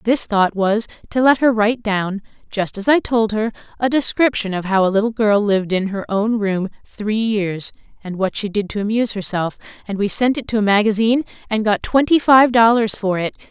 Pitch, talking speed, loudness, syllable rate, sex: 215 Hz, 215 wpm, -17 LUFS, 5.3 syllables/s, female